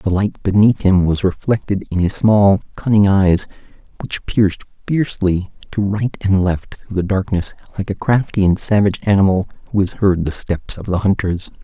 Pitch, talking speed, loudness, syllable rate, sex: 100 Hz, 180 wpm, -17 LUFS, 5.1 syllables/s, male